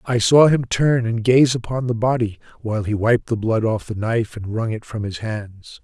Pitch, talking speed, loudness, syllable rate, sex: 115 Hz, 235 wpm, -19 LUFS, 4.9 syllables/s, male